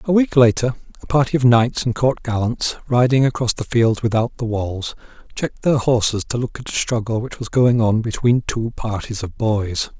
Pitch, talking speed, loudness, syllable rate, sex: 120 Hz, 205 wpm, -19 LUFS, 5.0 syllables/s, male